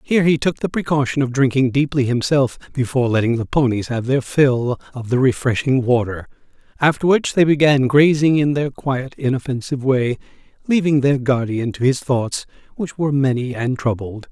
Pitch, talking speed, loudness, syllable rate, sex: 135 Hz, 170 wpm, -18 LUFS, 5.2 syllables/s, male